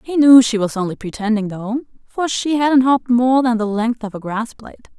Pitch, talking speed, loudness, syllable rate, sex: 235 Hz, 230 wpm, -17 LUFS, 5.4 syllables/s, female